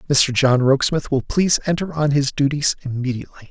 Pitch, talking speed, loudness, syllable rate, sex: 140 Hz, 170 wpm, -19 LUFS, 5.9 syllables/s, male